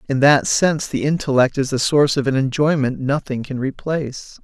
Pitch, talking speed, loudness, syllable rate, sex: 140 Hz, 190 wpm, -18 LUFS, 5.4 syllables/s, male